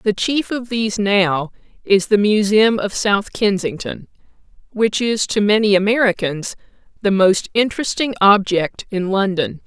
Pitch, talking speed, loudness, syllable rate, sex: 205 Hz, 135 wpm, -17 LUFS, 4.4 syllables/s, female